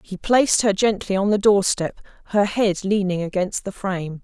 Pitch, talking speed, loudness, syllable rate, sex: 195 Hz, 200 wpm, -20 LUFS, 5.1 syllables/s, female